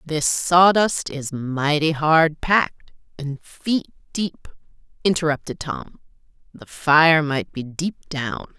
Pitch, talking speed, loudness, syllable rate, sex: 155 Hz, 120 wpm, -20 LUFS, 3.3 syllables/s, female